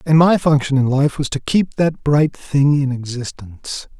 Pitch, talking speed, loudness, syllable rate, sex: 140 Hz, 195 wpm, -17 LUFS, 4.5 syllables/s, male